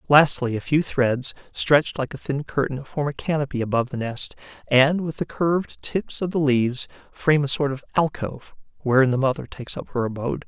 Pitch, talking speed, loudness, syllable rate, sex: 135 Hz, 200 wpm, -23 LUFS, 5.7 syllables/s, male